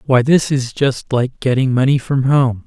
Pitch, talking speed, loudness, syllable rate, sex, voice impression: 130 Hz, 200 wpm, -15 LUFS, 4.4 syllables/s, male, masculine, adult-like, slightly relaxed, weak, clear, slightly halting, slightly sincere, friendly, slightly reassuring, unique, lively, kind, modest